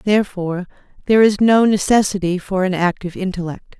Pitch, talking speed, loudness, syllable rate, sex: 190 Hz, 140 wpm, -17 LUFS, 6.0 syllables/s, female